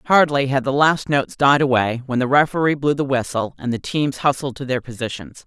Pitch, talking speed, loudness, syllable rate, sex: 135 Hz, 220 wpm, -19 LUFS, 5.6 syllables/s, female